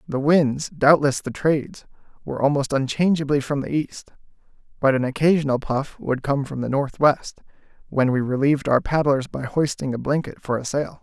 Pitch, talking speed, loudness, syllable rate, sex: 140 Hz, 175 wpm, -21 LUFS, 5.0 syllables/s, male